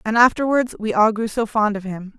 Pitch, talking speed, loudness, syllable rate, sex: 220 Hz, 245 wpm, -19 LUFS, 5.4 syllables/s, female